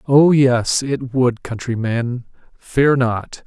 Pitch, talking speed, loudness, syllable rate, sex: 125 Hz, 105 wpm, -17 LUFS, 3.0 syllables/s, male